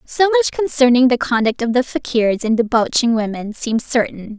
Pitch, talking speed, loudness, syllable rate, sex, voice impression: 245 Hz, 180 wpm, -17 LUFS, 5.3 syllables/s, female, very feminine, slightly young, tensed, clear, cute, slightly refreshing, slightly lively